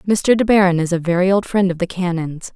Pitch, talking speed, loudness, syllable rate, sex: 180 Hz, 260 wpm, -17 LUFS, 5.9 syllables/s, female